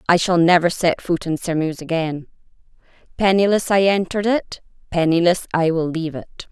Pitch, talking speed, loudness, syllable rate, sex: 175 Hz, 155 wpm, -19 LUFS, 5.5 syllables/s, female